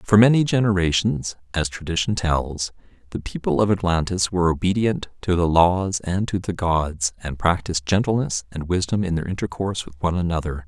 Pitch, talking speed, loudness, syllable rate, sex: 90 Hz, 170 wpm, -22 LUFS, 5.4 syllables/s, male